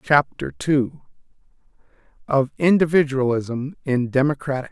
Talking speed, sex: 90 wpm, male